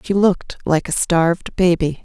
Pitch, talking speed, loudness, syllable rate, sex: 175 Hz, 175 wpm, -18 LUFS, 4.9 syllables/s, female